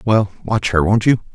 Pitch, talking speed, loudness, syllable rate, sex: 105 Hz, 225 wpm, -17 LUFS, 4.9 syllables/s, male